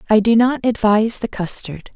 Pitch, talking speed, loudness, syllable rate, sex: 220 Hz, 185 wpm, -17 LUFS, 5.3 syllables/s, female